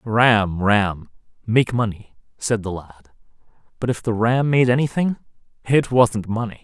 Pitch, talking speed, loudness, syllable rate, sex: 110 Hz, 145 wpm, -20 LUFS, 4.2 syllables/s, male